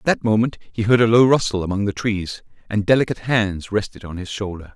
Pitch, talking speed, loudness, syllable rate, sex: 105 Hz, 225 wpm, -19 LUFS, 5.9 syllables/s, male